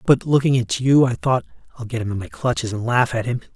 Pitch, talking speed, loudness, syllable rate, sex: 120 Hz, 270 wpm, -20 LUFS, 6.1 syllables/s, male